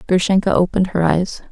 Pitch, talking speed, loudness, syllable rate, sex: 180 Hz, 160 wpm, -17 LUFS, 6.3 syllables/s, female